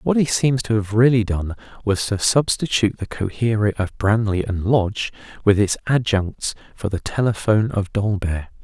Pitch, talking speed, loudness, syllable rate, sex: 105 Hz, 165 wpm, -20 LUFS, 4.9 syllables/s, male